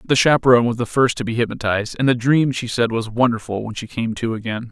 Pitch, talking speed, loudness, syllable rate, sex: 120 Hz, 255 wpm, -19 LUFS, 6.5 syllables/s, male